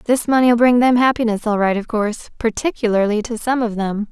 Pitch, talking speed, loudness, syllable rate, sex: 225 Hz, 190 wpm, -17 LUFS, 5.5 syllables/s, female